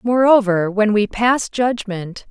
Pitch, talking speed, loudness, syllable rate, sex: 220 Hz, 130 wpm, -17 LUFS, 3.7 syllables/s, female